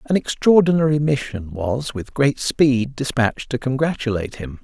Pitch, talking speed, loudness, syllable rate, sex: 130 Hz, 140 wpm, -20 LUFS, 4.9 syllables/s, male